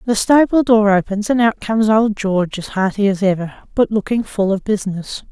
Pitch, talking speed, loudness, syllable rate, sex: 210 Hz, 205 wpm, -16 LUFS, 5.5 syllables/s, female